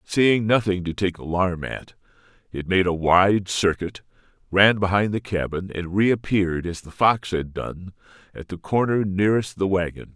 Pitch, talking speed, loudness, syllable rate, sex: 95 Hz, 165 wpm, -22 LUFS, 4.5 syllables/s, male